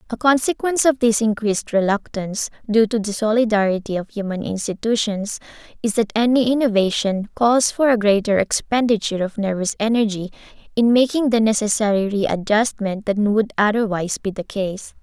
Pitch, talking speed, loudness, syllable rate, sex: 215 Hz, 145 wpm, -19 LUFS, 5.4 syllables/s, female